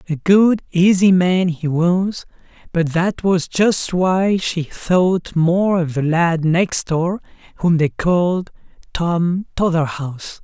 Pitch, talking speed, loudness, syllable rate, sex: 175 Hz, 140 wpm, -17 LUFS, 3.3 syllables/s, male